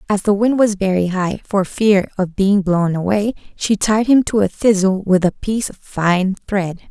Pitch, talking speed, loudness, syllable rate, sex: 195 Hz, 210 wpm, -17 LUFS, 4.5 syllables/s, female